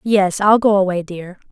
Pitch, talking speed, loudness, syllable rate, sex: 195 Hz, 200 wpm, -15 LUFS, 4.6 syllables/s, female